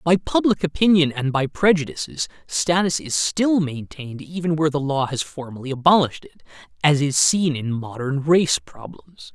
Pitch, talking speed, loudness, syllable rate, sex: 150 Hz, 160 wpm, -20 LUFS, 5.0 syllables/s, male